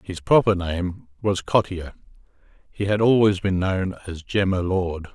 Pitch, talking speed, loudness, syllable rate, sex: 95 Hz, 150 wpm, -22 LUFS, 4.3 syllables/s, male